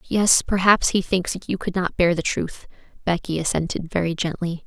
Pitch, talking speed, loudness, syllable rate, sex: 180 Hz, 180 wpm, -21 LUFS, 4.9 syllables/s, female